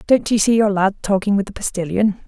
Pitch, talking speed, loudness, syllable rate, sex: 205 Hz, 235 wpm, -18 LUFS, 5.9 syllables/s, female